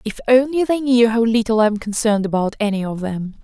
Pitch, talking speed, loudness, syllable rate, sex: 225 Hz, 225 wpm, -17 LUFS, 6.0 syllables/s, female